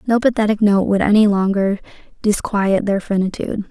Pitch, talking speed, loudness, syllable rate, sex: 205 Hz, 145 wpm, -17 LUFS, 5.5 syllables/s, female